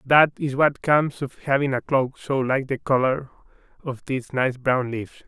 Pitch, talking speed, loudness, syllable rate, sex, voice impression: 135 Hz, 195 wpm, -23 LUFS, 4.8 syllables/s, male, masculine, adult-like, slightly tensed, slightly weak, clear, calm, friendly, slightly reassuring, unique, slightly lively, kind, slightly modest